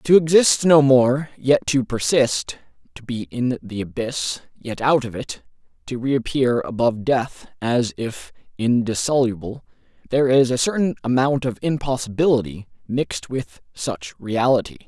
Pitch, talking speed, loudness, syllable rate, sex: 125 Hz, 135 wpm, -20 LUFS, 4.5 syllables/s, male